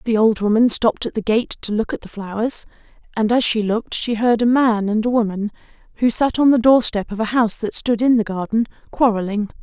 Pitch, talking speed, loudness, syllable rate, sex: 225 Hz, 235 wpm, -18 LUFS, 5.8 syllables/s, female